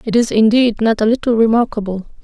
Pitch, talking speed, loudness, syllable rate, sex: 225 Hz, 190 wpm, -14 LUFS, 6.1 syllables/s, female